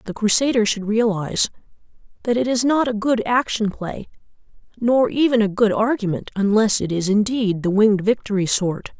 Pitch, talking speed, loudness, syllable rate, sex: 215 Hz, 165 wpm, -19 LUFS, 5.2 syllables/s, female